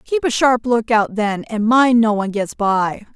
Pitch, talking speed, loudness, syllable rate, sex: 230 Hz, 230 wpm, -17 LUFS, 4.4 syllables/s, female